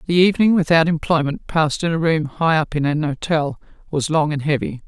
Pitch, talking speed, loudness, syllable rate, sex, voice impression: 155 Hz, 210 wpm, -19 LUFS, 5.7 syllables/s, female, gender-neutral, adult-like, tensed, powerful, clear, fluent, slightly cool, intellectual, calm, slightly unique, lively, strict, slightly sharp